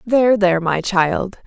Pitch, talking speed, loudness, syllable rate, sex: 195 Hz, 165 wpm, -17 LUFS, 4.6 syllables/s, female